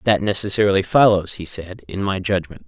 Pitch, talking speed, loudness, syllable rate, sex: 95 Hz, 180 wpm, -19 LUFS, 5.6 syllables/s, male